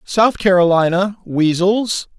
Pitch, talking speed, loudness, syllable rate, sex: 190 Hz, 80 wpm, -15 LUFS, 3.8 syllables/s, male